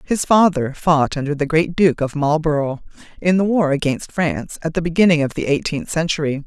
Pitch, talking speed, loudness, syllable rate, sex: 160 Hz, 195 wpm, -18 LUFS, 5.4 syllables/s, female